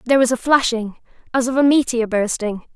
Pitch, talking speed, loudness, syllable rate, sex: 245 Hz, 195 wpm, -18 LUFS, 6.1 syllables/s, female